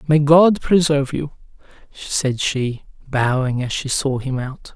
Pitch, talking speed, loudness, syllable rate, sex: 140 Hz, 150 wpm, -18 LUFS, 4.1 syllables/s, male